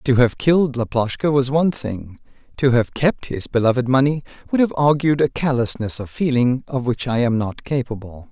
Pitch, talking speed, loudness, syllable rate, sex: 130 Hz, 190 wpm, -19 LUFS, 5.2 syllables/s, male